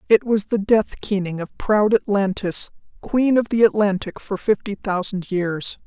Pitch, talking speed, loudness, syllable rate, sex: 205 Hz, 165 wpm, -20 LUFS, 4.4 syllables/s, female